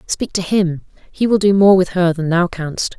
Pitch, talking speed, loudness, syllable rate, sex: 180 Hz, 240 wpm, -16 LUFS, 4.5 syllables/s, female